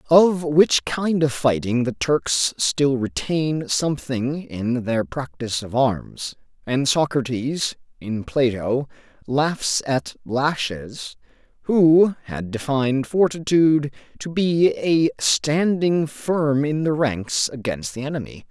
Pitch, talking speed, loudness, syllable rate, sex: 140 Hz, 120 wpm, -21 LUFS, 3.4 syllables/s, male